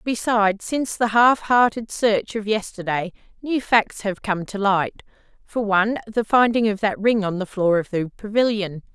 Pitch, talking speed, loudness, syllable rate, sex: 210 Hz, 180 wpm, -21 LUFS, 4.7 syllables/s, female